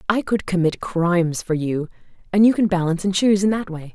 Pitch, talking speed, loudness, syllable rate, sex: 185 Hz, 215 wpm, -20 LUFS, 6.0 syllables/s, female